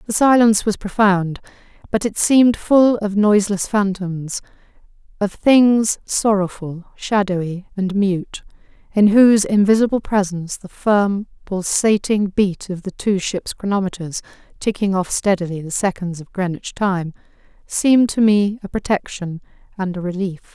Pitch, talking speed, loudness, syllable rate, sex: 200 Hz, 135 wpm, -18 LUFS, 4.6 syllables/s, female